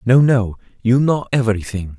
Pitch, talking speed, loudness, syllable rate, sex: 115 Hz, 150 wpm, -17 LUFS, 5.0 syllables/s, male